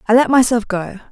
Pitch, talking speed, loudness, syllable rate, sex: 225 Hz, 215 wpm, -15 LUFS, 5.8 syllables/s, female